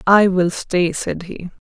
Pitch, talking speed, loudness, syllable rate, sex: 185 Hz, 180 wpm, -18 LUFS, 3.6 syllables/s, female